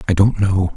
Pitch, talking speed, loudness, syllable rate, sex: 95 Hz, 235 wpm, -16 LUFS, 5.3 syllables/s, male